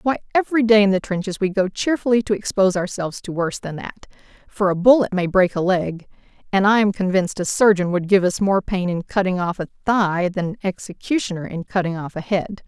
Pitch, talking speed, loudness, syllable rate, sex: 190 Hz, 220 wpm, -20 LUFS, 5.9 syllables/s, female